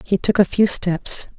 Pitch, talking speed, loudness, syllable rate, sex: 195 Hz, 215 wpm, -18 LUFS, 4.1 syllables/s, female